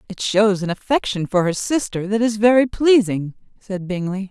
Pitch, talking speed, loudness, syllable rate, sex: 205 Hz, 180 wpm, -19 LUFS, 4.9 syllables/s, female